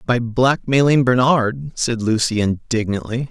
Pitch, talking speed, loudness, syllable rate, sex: 120 Hz, 110 wpm, -18 LUFS, 4.1 syllables/s, male